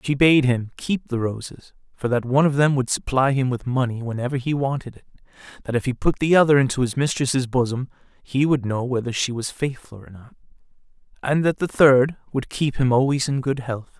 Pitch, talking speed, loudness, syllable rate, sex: 130 Hz, 215 wpm, -21 LUFS, 5.5 syllables/s, male